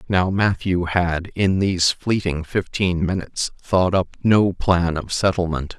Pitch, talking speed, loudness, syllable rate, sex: 90 Hz, 145 wpm, -20 LUFS, 4.1 syllables/s, male